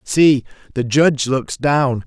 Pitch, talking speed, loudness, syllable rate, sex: 135 Hz, 145 wpm, -16 LUFS, 3.6 syllables/s, male